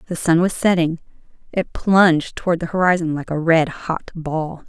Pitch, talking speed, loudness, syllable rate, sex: 170 Hz, 180 wpm, -19 LUFS, 4.8 syllables/s, female